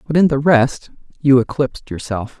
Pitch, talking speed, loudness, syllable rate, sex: 130 Hz, 175 wpm, -16 LUFS, 5.1 syllables/s, male